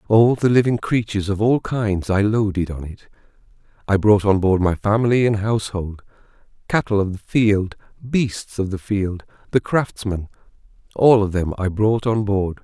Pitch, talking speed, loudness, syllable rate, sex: 105 Hz, 170 wpm, -19 LUFS, 4.7 syllables/s, male